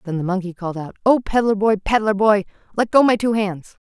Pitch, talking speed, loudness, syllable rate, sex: 205 Hz, 235 wpm, -19 LUFS, 5.9 syllables/s, female